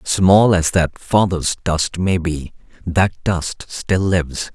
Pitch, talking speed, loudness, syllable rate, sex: 85 Hz, 145 wpm, -17 LUFS, 3.2 syllables/s, male